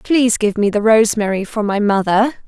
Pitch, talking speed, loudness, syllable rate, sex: 215 Hz, 195 wpm, -15 LUFS, 5.8 syllables/s, female